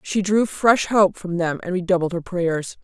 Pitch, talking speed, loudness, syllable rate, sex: 185 Hz, 210 wpm, -20 LUFS, 4.5 syllables/s, female